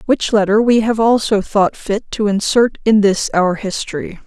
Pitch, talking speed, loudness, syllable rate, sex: 210 Hz, 185 wpm, -15 LUFS, 4.6 syllables/s, female